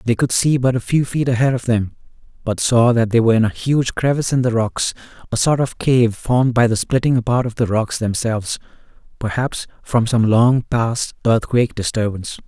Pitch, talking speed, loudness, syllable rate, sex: 120 Hz, 200 wpm, -18 LUFS, 5.4 syllables/s, male